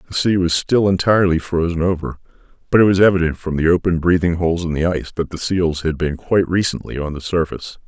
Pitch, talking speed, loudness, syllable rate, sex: 85 Hz, 220 wpm, -18 LUFS, 6.4 syllables/s, male